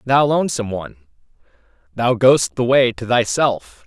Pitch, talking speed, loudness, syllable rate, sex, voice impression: 120 Hz, 140 wpm, -17 LUFS, 5.0 syllables/s, male, very masculine, very adult-like, thick, tensed, powerful, bright, slightly soft, very clear, very fluent, cool, intellectual, very refreshing, sincere, slightly calm, very friendly, very reassuring, slightly unique, slightly elegant, wild, sweet, very lively, kind, slightly intense